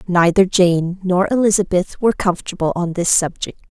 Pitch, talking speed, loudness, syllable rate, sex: 185 Hz, 145 wpm, -17 LUFS, 5.2 syllables/s, female